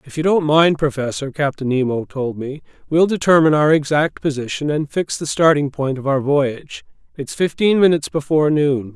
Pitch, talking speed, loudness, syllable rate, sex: 150 Hz, 180 wpm, -17 LUFS, 5.3 syllables/s, male